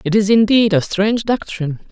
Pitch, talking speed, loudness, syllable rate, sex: 230 Hz, 190 wpm, -15 LUFS, 5.8 syllables/s, female